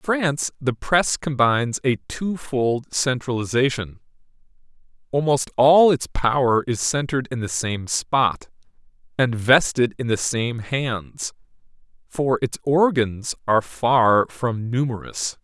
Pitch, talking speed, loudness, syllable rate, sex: 130 Hz, 120 wpm, -21 LUFS, 3.8 syllables/s, male